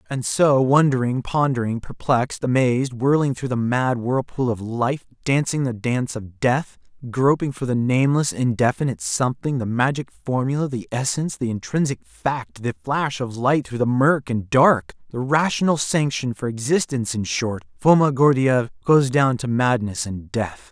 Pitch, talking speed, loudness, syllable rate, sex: 130 Hz, 155 wpm, -21 LUFS, 4.8 syllables/s, male